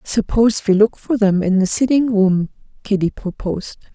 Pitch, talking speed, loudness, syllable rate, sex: 205 Hz, 165 wpm, -17 LUFS, 5.1 syllables/s, female